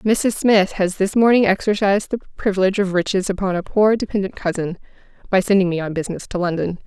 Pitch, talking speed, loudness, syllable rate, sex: 195 Hz, 190 wpm, -19 LUFS, 6.2 syllables/s, female